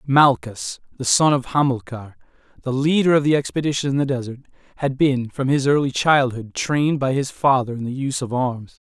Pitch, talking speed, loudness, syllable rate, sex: 135 Hz, 190 wpm, -20 LUFS, 5.4 syllables/s, male